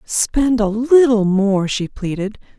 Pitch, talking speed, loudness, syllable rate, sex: 220 Hz, 140 wpm, -16 LUFS, 3.5 syllables/s, female